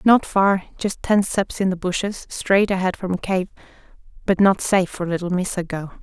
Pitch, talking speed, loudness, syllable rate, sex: 190 Hz, 190 wpm, -21 LUFS, 4.9 syllables/s, female